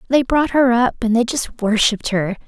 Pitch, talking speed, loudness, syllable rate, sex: 235 Hz, 220 wpm, -17 LUFS, 5.0 syllables/s, female